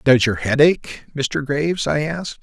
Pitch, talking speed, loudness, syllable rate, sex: 145 Hz, 200 wpm, -19 LUFS, 4.6 syllables/s, male